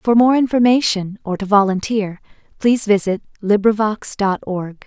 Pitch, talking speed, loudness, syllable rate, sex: 210 Hz, 135 wpm, -17 LUFS, 4.8 syllables/s, female